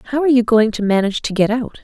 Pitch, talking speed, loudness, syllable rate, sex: 230 Hz, 295 wpm, -16 LUFS, 7.6 syllables/s, female